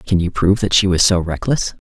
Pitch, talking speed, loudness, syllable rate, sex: 95 Hz, 260 wpm, -16 LUFS, 5.8 syllables/s, male